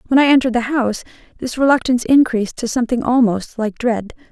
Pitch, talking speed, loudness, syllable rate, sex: 240 Hz, 180 wpm, -16 LUFS, 6.7 syllables/s, female